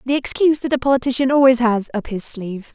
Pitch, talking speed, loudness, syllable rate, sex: 250 Hz, 220 wpm, -17 LUFS, 6.5 syllables/s, female